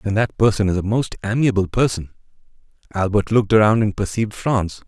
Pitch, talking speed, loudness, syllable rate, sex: 105 Hz, 170 wpm, -19 LUFS, 6.0 syllables/s, male